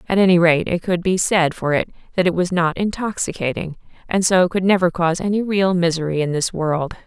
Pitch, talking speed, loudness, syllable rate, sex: 175 Hz, 210 wpm, -19 LUFS, 5.6 syllables/s, female